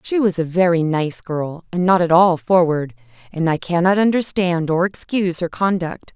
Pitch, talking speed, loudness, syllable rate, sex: 170 Hz, 185 wpm, -18 LUFS, 4.8 syllables/s, female